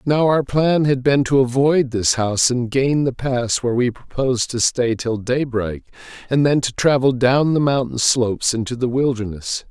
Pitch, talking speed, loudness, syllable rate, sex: 130 Hz, 190 wpm, -18 LUFS, 4.7 syllables/s, male